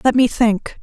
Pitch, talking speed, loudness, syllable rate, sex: 235 Hz, 220 wpm, -16 LUFS, 4.1 syllables/s, female